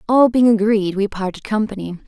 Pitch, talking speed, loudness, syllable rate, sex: 210 Hz, 175 wpm, -17 LUFS, 5.5 syllables/s, female